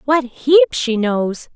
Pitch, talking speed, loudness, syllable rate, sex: 250 Hz, 155 wpm, -16 LUFS, 2.8 syllables/s, female